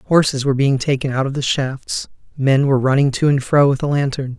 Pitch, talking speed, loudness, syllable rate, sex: 135 Hz, 230 wpm, -17 LUFS, 5.6 syllables/s, male